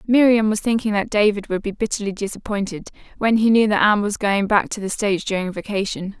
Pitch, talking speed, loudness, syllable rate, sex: 205 Hz, 215 wpm, -20 LUFS, 6.1 syllables/s, female